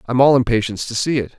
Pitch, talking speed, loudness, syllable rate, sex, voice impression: 120 Hz, 305 wpm, -17 LUFS, 8.3 syllables/s, male, very masculine, very adult-like, slightly thick, cool, sincere, slightly reassuring